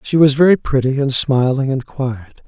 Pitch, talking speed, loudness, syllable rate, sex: 135 Hz, 195 wpm, -15 LUFS, 5.2 syllables/s, male